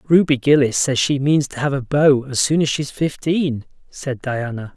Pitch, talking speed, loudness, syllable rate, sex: 140 Hz, 200 wpm, -18 LUFS, 4.6 syllables/s, male